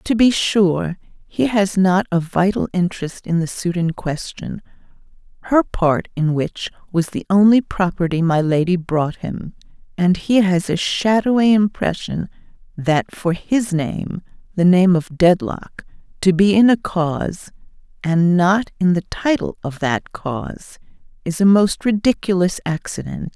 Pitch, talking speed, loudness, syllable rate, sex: 185 Hz, 145 wpm, -18 LUFS, 4.1 syllables/s, female